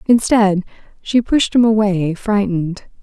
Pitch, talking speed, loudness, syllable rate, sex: 205 Hz, 100 wpm, -16 LUFS, 4.2 syllables/s, female